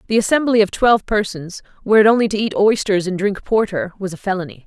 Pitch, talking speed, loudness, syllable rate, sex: 200 Hz, 220 wpm, -17 LUFS, 6.4 syllables/s, female